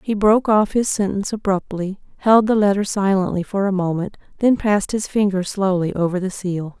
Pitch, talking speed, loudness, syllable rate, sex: 195 Hz, 185 wpm, -19 LUFS, 5.4 syllables/s, female